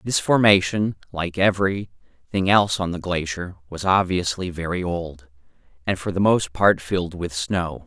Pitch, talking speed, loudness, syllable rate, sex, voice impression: 90 Hz, 160 wpm, -22 LUFS, 4.7 syllables/s, male, masculine, middle-aged, tensed, powerful, fluent, calm, slightly mature, wild, lively, slightly strict, slightly sharp